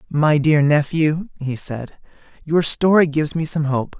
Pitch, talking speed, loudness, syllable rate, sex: 155 Hz, 165 wpm, -18 LUFS, 4.3 syllables/s, male